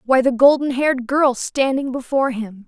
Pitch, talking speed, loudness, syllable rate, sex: 260 Hz, 180 wpm, -18 LUFS, 5.1 syllables/s, female